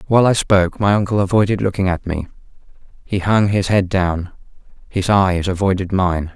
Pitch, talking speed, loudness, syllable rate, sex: 95 Hz, 170 wpm, -17 LUFS, 5.4 syllables/s, male